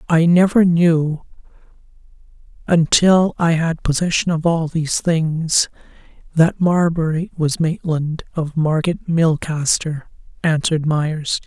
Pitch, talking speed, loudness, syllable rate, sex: 160 Hz, 105 wpm, -17 LUFS, 3.8 syllables/s, male